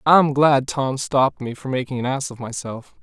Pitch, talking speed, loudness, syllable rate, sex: 135 Hz, 220 wpm, -20 LUFS, 4.9 syllables/s, male